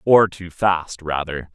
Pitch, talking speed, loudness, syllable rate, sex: 85 Hz, 155 wpm, -20 LUFS, 3.5 syllables/s, male